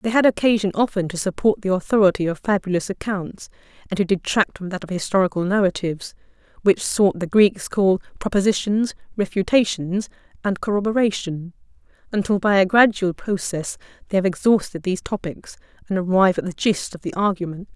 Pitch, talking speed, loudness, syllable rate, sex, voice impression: 195 Hz, 155 wpm, -21 LUFS, 5.7 syllables/s, female, feminine, bright, slightly soft, clear, fluent, intellectual, slightly refreshing, calm, slightly friendly, unique, elegant, lively, slightly sharp